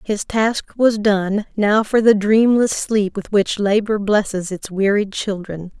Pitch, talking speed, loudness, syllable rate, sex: 205 Hz, 165 wpm, -17 LUFS, 3.9 syllables/s, female